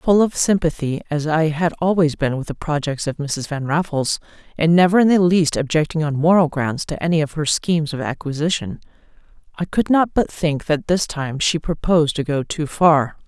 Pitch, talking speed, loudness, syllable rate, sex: 160 Hz, 205 wpm, -19 LUFS, 5.1 syllables/s, female